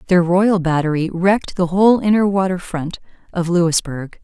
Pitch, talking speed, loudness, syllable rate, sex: 180 Hz, 155 wpm, -17 LUFS, 4.9 syllables/s, female